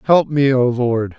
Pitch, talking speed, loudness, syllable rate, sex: 130 Hz, 205 wpm, -16 LUFS, 3.9 syllables/s, male